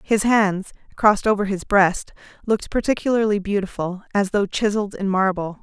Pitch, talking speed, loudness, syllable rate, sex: 200 Hz, 150 wpm, -20 LUFS, 5.4 syllables/s, female